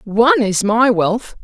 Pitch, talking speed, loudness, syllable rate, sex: 215 Hz, 165 wpm, -14 LUFS, 3.9 syllables/s, female